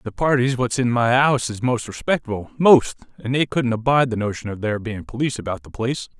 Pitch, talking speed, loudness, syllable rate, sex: 120 Hz, 215 wpm, -20 LUFS, 6.2 syllables/s, male